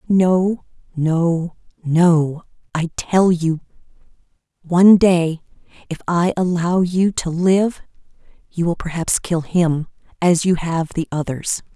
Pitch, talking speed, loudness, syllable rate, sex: 170 Hz, 120 wpm, -18 LUFS, 3.5 syllables/s, female